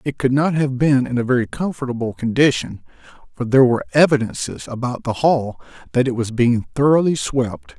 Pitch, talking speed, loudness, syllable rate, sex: 125 Hz, 175 wpm, -18 LUFS, 5.5 syllables/s, male